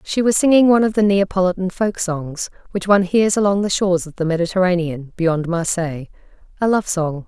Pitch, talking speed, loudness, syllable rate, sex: 185 Hz, 180 wpm, -18 LUFS, 5.8 syllables/s, female